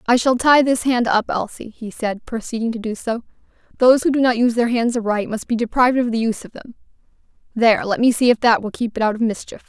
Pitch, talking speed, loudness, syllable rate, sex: 235 Hz, 255 wpm, -18 LUFS, 6.5 syllables/s, female